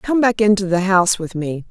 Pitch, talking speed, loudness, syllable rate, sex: 195 Hz, 245 wpm, -17 LUFS, 5.5 syllables/s, female